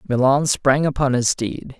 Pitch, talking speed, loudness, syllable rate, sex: 135 Hz, 165 wpm, -19 LUFS, 4.4 syllables/s, male